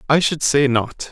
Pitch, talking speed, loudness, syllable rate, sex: 140 Hz, 215 wpm, -17 LUFS, 4.3 syllables/s, male